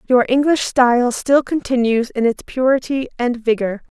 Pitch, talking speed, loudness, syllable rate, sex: 250 Hz, 150 wpm, -17 LUFS, 4.8 syllables/s, female